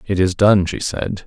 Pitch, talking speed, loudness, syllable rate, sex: 95 Hz, 235 wpm, -17 LUFS, 4.4 syllables/s, male